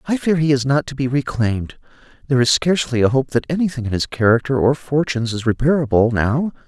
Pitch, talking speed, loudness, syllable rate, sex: 135 Hz, 205 wpm, -18 LUFS, 6.3 syllables/s, male